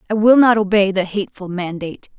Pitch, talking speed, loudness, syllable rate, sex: 200 Hz, 190 wpm, -16 LUFS, 6.2 syllables/s, female